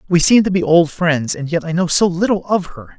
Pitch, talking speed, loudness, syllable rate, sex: 170 Hz, 280 wpm, -15 LUFS, 5.4 syllables/s, male